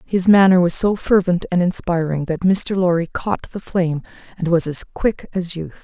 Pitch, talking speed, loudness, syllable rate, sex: 180 Hz, 195 wpm, -18 LUFS, 4.9 syllables/s, female